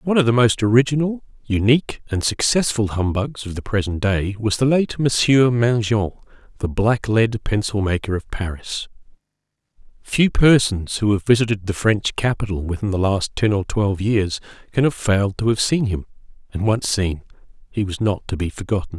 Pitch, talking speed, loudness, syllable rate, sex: 110 Hz, 175 wpm, -20 LUFS, 5.1 syllables/s, male